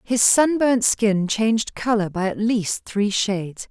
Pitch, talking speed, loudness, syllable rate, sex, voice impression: 215 Hz, 160 wpm, -20 LUFS, 3.9 syllables/s, female, feminine, adult-like, relaxed, slightly powerful, hard, clear, fluent, slightly raspy, intellectual, calm, slightly friendly, reassuring, elegant, slightly lively, slightly kind